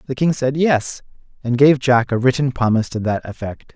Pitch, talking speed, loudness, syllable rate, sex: 125 Hz, 210 wpm, -17 LUFS, 5.3 syllables/s, male